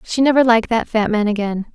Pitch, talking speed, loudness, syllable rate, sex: 225 Hz, 240 wpm, -16 LUFS, 6.3 syllables/s, female